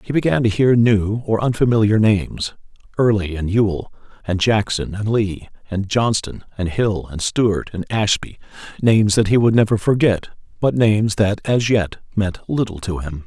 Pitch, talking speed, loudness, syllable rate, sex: 105 Hz, 170 wpm, -18 LUFS, 4.8 syllables/s, male